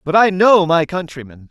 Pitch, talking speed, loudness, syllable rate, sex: 170 Hz, 200 wpm, -14 LUFS, 5.0 syllables/s, male